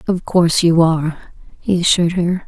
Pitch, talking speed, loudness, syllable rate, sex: 170 Hz, 170 wpm, -15 LUFS, 5.7 syllables/s, female